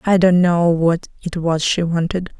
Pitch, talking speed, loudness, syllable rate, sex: 175 Hz, 200 wpm, -17 LUFS, 4.3 syllables/s, female